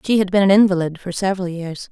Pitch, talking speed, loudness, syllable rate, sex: 185 Hz, 250 wpm, -18 LUFS, 6.8 syllables/s, female